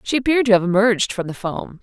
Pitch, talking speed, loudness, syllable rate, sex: 215 Hz, 265 wpm, -18 LUFS, 6.9 syllables/s, female